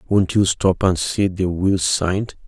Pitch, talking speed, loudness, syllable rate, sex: 90 Hz, 195 wpm, -19 LUFS, 4.1 syllables/s, male